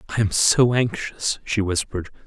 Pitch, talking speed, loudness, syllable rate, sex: 105 Hz, 160 wpm, -21 LUFS, 5.2 syllables/s, male